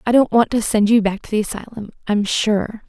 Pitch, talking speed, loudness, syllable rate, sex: 215 Hz, 250 wpm, -18 LUFS, 5.4 syllables/s, female